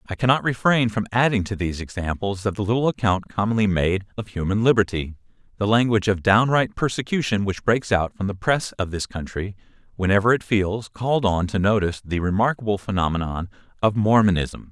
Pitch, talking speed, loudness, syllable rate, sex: 105 Hz, 175 wpm, -22 LUFS, 5.8 syllables/s, male